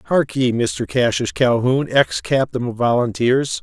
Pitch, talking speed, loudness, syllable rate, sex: 125 Hz, 150 wpm, -18 LUFS, 4.1 syllables/s, male